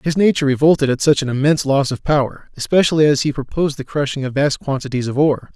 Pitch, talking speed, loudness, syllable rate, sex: 140 Hz, 225 wpm, -17 LUFS, 6.9 syllables/s, male